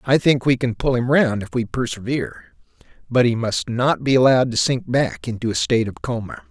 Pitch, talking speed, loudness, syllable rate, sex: 120 Hz, 220 wpm, -20 LUFS, 5.6 syllables/s, male